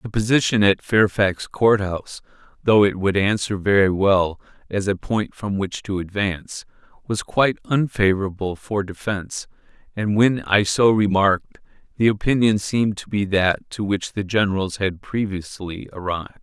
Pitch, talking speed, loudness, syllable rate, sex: 100 Hz, 155 wpm, -20 LUFS, 4.8 syllables/s, male